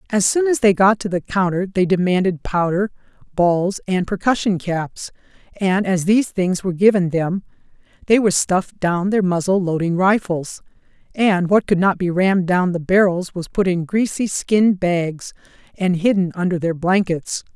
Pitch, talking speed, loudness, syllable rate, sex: 185 Hz, 170 wpm, -18 LUFS, 4.8 syllables/s, female